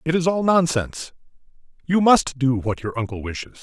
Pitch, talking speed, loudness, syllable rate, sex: 145 Hz, 180 wpm, -21 LUFS, 5.3 syllables/s, male